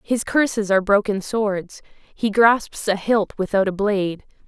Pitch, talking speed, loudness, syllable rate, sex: 205 Hz, 160 wpm, -20 LUFS, 4.2 syllables/s, female